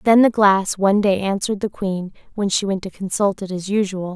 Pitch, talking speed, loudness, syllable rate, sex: 195 Hz, 230 wpm, -19 LUFS, 5.4 syllables/s, female